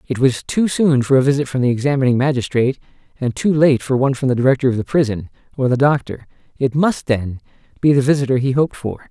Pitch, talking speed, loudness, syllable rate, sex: 135 Hz, 225 wpm, -17 LUFS, 6.5 syllables/s, male